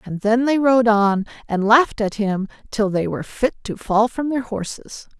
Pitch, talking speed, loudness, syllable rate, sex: 220 Hz, 210 wpm, -19 LUFS, 4.7 syllables/s, female